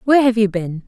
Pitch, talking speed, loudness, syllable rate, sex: 215 Hz, 275 wpm, -17 LUFS, 6.8 syllables/s, female